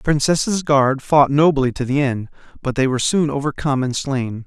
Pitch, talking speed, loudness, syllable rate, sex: 140 Hz, 200 wpm, -18 LUFS, 5.1 syllables/s, male